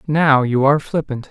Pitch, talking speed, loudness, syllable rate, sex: 140 Hz, 185 wpm, -16 LUFS, 5.1 syllables/s, male